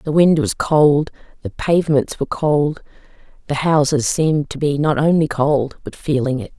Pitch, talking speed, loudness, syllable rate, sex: 145 Hz, 175 wpm, -17 LUFS, 4.8 syllables/s, female